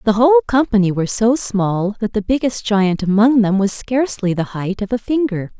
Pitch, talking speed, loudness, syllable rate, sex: 215 Hz, 205 wpm, -17 LUFS, 5.4 syllables/s, female